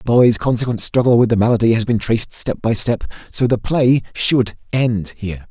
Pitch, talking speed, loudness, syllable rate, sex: 115 Hz, 205 wpm, -16 LUFS, 5.4 syllables/s, male